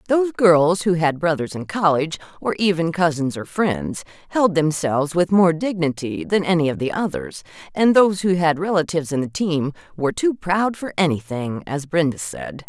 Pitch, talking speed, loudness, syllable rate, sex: 165 Hz, 180 wpm, -20 LUFS, 5.1 syllables/s, female